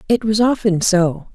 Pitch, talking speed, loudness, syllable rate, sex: 200 Hz, 180 wpm, -16 LUFS, 4.5 syllables/s, female